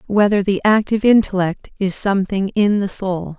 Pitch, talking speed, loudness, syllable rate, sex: 200 Hz, 160 wpm, -17 LUFS, 5.2 syllables/s, female